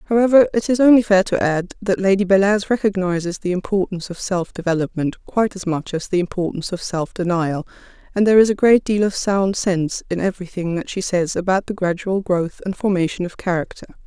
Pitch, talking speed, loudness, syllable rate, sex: 190 Hz, 200 wpm, -19 LUFS, 5.8 syllables/s, female